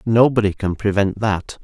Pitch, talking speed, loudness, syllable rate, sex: 105 Hz, 145 wpm, -18 LUFS, 4.6 syllables/s, male